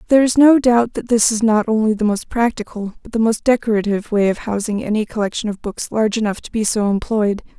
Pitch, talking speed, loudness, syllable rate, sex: 220 Hz, 230 wpm, -17 LUFS, 6.2 syllables/s, female